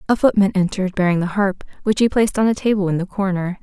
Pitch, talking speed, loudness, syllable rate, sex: 195 Hz, 250 wpm, -18 LUFS, 6.9 syllables/s, female